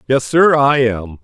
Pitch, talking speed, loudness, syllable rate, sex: 125 Hz, 195 wpm, -13 LUFS, 3.9 syllables/s, male